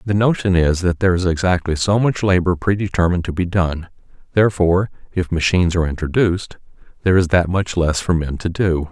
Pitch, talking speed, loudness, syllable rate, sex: 90 Hz, 190 wpm, -18 LUFS, 6.1 syllables/s, male